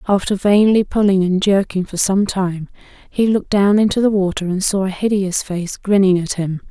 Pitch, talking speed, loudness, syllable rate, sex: 195 Hz, 195 wpm, -16 LUFS, 5.1 syllables/s, female